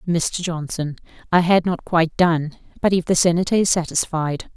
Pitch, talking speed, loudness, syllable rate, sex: 170 Hz, 170 wpm, -20 LUFS, 5.2 syllables/s, female